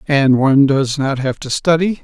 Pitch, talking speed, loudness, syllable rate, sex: 140 Hz, 205 wpm, -15 LUFS, 4.7 syllables/s, male